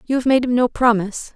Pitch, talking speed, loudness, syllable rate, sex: 240 Hz, 265 wpm, -18 LUFS, 6.5 syllables/s, female